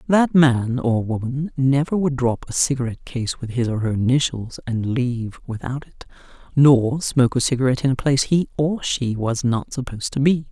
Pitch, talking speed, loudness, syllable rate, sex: 130 Hz, 195 wpm, -20 LUFS, 5.2 syllables/s, female